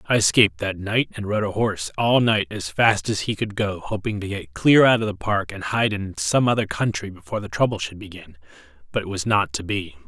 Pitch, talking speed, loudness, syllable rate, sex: 100 Hz, 245 wpm, -22 LUFS, 5.6 syllables/s, male